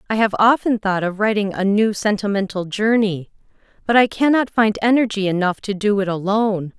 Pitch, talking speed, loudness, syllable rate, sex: 210 Hz, 175 wpm, -18 LUFS, 5.4 syllables/s, female